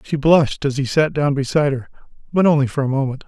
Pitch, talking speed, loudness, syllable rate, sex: 140 Hz, 240 wpm, -18 LUFS, 6.6 syllables/s, male